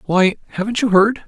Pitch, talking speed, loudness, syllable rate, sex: 205 Hz, 190 wpm, -17 LUFS, 5.6 syllables/s, male